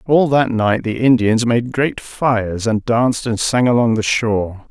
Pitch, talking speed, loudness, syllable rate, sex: 115 Hz, 190 wpm, -16 LUFS, 4.4 syllables/s, male